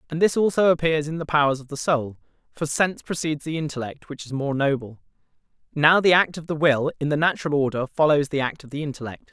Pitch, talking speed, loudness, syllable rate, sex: 150 Hz, 225 wpm, -22 LUFS, 6.3 syllables/s, male